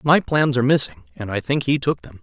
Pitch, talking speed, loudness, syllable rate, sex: 125 Hz, 270 wpm, -20 LUFS, 5.9 syllables/s, male